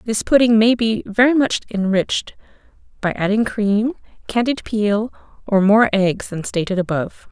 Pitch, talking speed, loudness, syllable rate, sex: 215 Hz, 150 wpm, -18 LUFS, 4.7 syllables/s, female